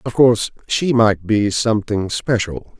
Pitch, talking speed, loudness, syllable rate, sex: 110 Hz, 150 wpm, -17 LUFS, 4.4 syllables/s, male